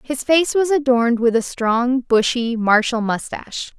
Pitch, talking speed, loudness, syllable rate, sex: 245 Hz, 160 wpm, -18 LUFS, 4.4 syllables/s, female